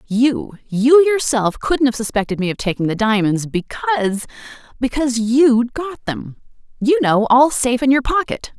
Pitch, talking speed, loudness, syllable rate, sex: 245 Hz, 145 wpm, -17 LUFS, 4.6 syllables/s, female